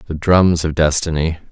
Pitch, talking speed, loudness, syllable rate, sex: 80 Hz, 160 wpm, -16 LUFS, 4.9 syllables/s, male